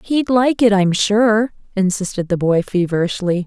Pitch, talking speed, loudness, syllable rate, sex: 205 Hz, 155 wpm, -16 LUFS, 4.4 syllables/s, female